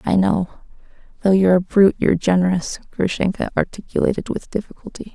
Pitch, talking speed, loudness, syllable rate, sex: 190 Hz, 140 wpm, -19 LUFS, 6.3 syllables/s, female